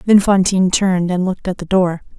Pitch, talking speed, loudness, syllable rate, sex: 185 Hz, 220 wpm, -16 LUFS, 6.2 syllables/s, female